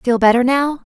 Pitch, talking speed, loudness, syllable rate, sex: 255 Hz, 190 wpm, -15 LUFS, 4.9 syllables/s, female